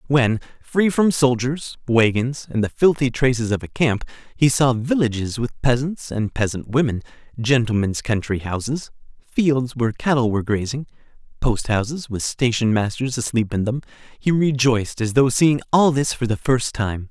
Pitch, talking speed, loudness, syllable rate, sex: 125 Hz, 150 wpm, -20 LUFS, 4.8 syllables/s, male